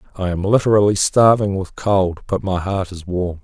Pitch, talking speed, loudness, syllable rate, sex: 95 Hz, 190 wpm, -18 LUFS, 5.0 syllables/s, male